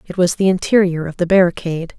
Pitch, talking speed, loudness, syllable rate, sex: 180 Hz, 210 wpm, -16 LUFS, 6.4 syllables/s, female